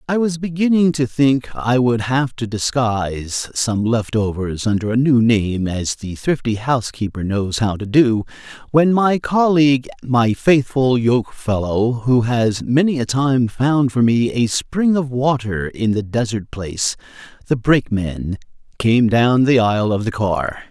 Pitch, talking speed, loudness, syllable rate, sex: 120 Hz, 160 wpm, -18 LUFS, 4.1 syllables/s, male